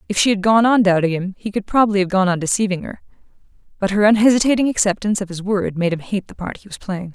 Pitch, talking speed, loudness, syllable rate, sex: 200 Hz, 250 wpm, -18 LUFS, 6.8 syllables/s, female